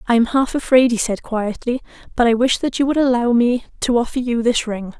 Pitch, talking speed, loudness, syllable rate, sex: 240 Hz, 240 wpm, -18 LUFS, 5.6 syllables/s, female